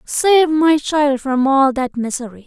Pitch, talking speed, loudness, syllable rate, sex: 275 Hz, 170 wpm, -15 LUFS, 3.8 syllables/s, female